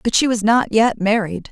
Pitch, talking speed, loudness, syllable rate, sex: 215 Hz, 235 wpm, -17 LUFS, 4.8 syllables/s, female